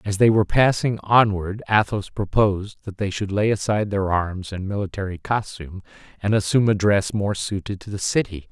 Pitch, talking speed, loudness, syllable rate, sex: 100 Hz, 185 wpm, -21 LUFS, 5.4 syllables/s, male